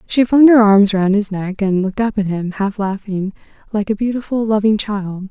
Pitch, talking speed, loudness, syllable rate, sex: 205 Hz, 215 wpm, -16 LUFS, 5.0 syllables/s, female